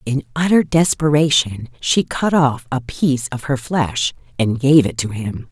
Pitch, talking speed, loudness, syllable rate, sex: 135 Hz, 175 wpm, -17 LUFS, 4.3 syllables/s, female